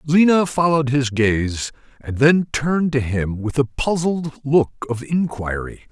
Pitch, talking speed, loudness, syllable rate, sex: 135 Hz, 150 wpm, -19 LUFS, 4.1 syllables/s, male